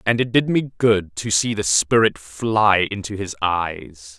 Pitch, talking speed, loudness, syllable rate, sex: 100 Hz, 185 wpm, -19 LUFS, 3.7 syllables/s, male